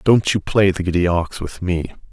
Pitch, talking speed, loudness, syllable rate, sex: 90 Hz, 225 wpm, -19 LUFS, 4.8 syllables/s, male